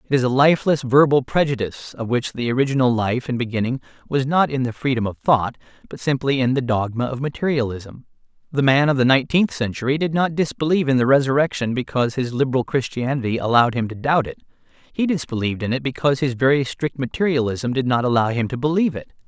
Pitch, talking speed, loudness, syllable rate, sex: 130 Hz, 200 wpm, -20 LUFS, 6.4 syllables/s, male